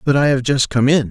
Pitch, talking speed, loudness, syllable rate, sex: 135 Hz, 325 wpm, -16 LUFS, 5.9 syllables/s, male